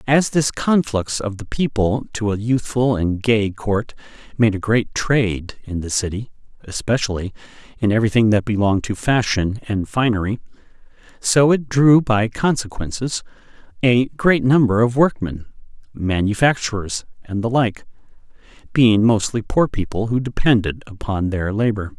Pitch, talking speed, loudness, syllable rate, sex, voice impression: 115 Hz, 140 wpm, -19 LUFS, 4.6 syllables/s, male, very masculine, adult-like, thick, tensed, very powerful, bright, slightly soft, very clear, fluent, cool, intellectual, very refreshing, very sincere, calm, very friendly, very reassuring, unique, very elegant, lively, very kind, slightly intense, light